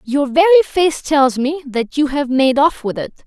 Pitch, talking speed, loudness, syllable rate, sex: 285 Hz, 220 wpm, -15 LUFS, 4.3 syllables/s, female